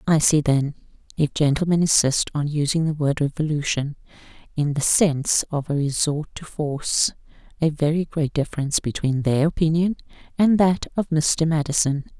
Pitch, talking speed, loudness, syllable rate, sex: 155 Hz, 145 wpm, -21 LUFS, 5.1 syllables/s, female